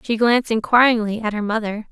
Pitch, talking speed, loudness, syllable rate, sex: 225 Hz, 190 wpm, -18 LUFS, 6.1 syllables/s, female